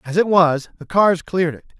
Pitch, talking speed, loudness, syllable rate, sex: 170 Hz, 235 wpm, -18 LUFS, 5.6 syllables/s, male